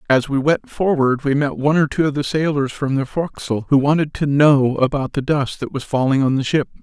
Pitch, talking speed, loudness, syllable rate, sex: 145 Hz, 245 wpm, -18 LUFS, 5.7 syllables/s, male